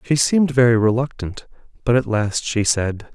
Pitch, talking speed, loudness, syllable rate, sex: 120 Hz, 170 wpm, -18 LUFS, 4.9 syllables/s, male